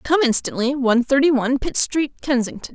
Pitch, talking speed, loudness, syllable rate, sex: 270 Hz, 175 wpm, -19 LUFS, 5.8 syllables/s, female